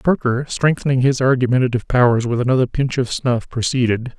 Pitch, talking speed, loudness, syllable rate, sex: 125 Hz, 160 wpm, -18 LUFS, 6.0 syllables/s, male